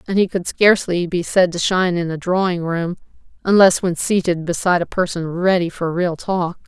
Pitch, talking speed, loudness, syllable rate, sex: 175 Hz, 190 wpm, -18 LUFS, 5.3 syllables/s, female